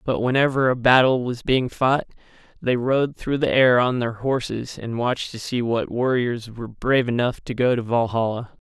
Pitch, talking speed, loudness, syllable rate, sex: 125 Hz, 195 wpm, -21 LUFS, 4.9 syllables/s, male